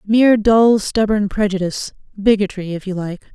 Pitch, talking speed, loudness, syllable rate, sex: 205 Hz, 145 wpm, -16 LUFS, 5.3 syllables/s, female